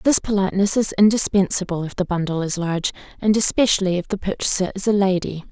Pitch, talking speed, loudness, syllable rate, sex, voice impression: 190 Hz, 185 wpm, -19 LUFS, 6.3 syllables/s, female, feminine, slightly adult-like, slightly soft, slightly calm, friendly, slightly kind